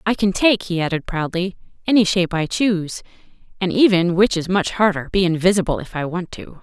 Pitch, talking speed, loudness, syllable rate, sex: 185 Hz, 200 wpm, -19 LUFS, 5.8 syllables/s, female